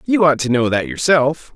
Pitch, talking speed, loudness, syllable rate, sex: 140 Hz, 230 wpm, -16 LUFS, 4.9 syllables/s, male